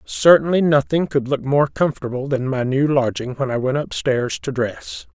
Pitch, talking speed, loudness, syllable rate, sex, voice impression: 135 Hz, 185 wpm, -19 LUFS, 4.8 syllables/s, male, masculine, very adult-like, very old, thick, relaxed, weak, slightly bright, hard, muffled, slightly fluent, raspy, cool, intellectual, sincere, slightly calm, very mature, slightly friendly, slightly reassuring, very unique, slightly elegant, very wild, slightly lively, strict, slightly intense, slightly sharp